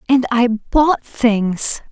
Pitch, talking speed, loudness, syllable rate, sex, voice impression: 240 Hz, 125 wpm, -16 LUFS, 2.5 syllables/s, female, gender-neutral, young, tensed, powerful, slightly soft, clear, cute, friendly, lively, slightly intense